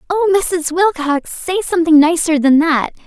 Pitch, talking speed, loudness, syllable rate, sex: 335 Hz, 155 wpm, -14 LUFS, 4.6 syllables/s, female